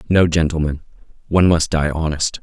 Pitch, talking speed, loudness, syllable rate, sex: 80 Hz, 150 wpm, -17 LUFS, 5.7 syllables/s, male